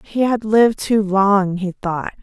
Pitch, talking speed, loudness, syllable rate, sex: 205 Hz, 190 wpm, -17 LUFS, 4.0 syllables/s, female